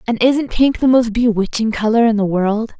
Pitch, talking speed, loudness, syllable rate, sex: 225 Hz, 215 wpm, -15 LUFS, 4.9 syllables/s, female